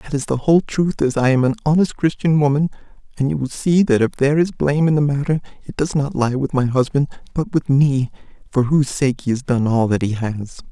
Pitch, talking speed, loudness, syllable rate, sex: 140 Hz, 245 wpm, -18 LUFS, 5.8 syllables/s, male